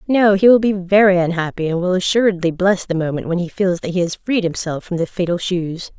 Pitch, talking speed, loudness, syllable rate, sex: 185 Hz, 240 wpm, -17 LUFS, 5.7 syllables/s, female